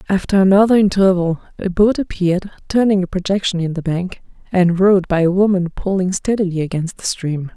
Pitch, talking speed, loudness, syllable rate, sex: 185 Hz, 175 wpm, -16 LUFS, 5.7 syllables/s, female